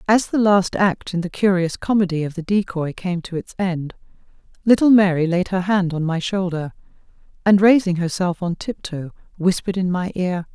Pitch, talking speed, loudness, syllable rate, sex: 185 Hz, 180 wpm, -19 LUFS, 5.1 syllables/s, female